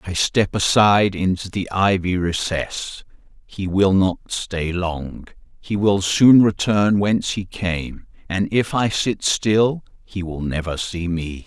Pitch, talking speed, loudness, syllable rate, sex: 95 Hz, 150 wpm, -19 LUFS, 3.7 syllables/s, male